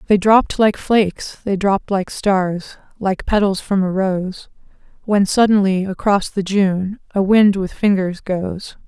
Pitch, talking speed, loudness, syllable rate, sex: 195 Hz, 155 wpm, -17 LUFS, 4.1 syllables/s, female